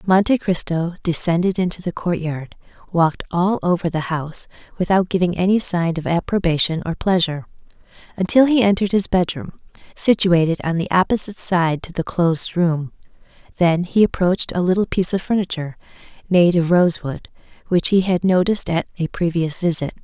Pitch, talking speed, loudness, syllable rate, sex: 175 Hz, 155 wpm, -19 LUFS, 5.7 syllables/s, female